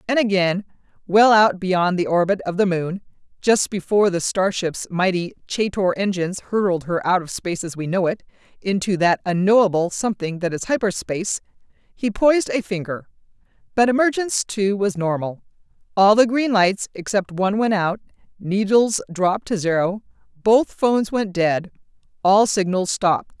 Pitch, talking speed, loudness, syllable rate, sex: 195 Hz, 155 wpm, -20 LUFS, 5.1 syllables/s, female